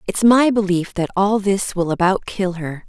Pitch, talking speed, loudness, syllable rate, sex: 190 Hz, 210 wpm, -18 LUFS, 4.5 syllables/s, female